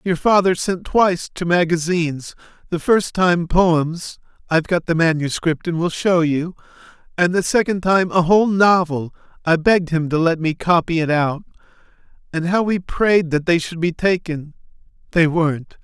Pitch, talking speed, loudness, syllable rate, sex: 170 Hz, 165 wpm, -18 LUFS, 3.5 syllables/s, male